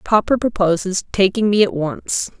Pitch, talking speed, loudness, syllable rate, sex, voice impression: 195 Hz, 150 wpm, -18 LUFS, 4.6 syllables/s, female, feminine, slightly middle-aged, tensed, clear, halting, calm, friendly, slightly unique, lively, modest